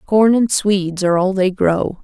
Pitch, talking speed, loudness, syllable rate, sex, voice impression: 195 Hz, 205 wpm, -16 LUFS, 4.8 syllables/s, female, feminine, middle-aged, tensed, powerful, slightly dark, clear, raspy, intellectual, calm, elegant, lively, slightly sharp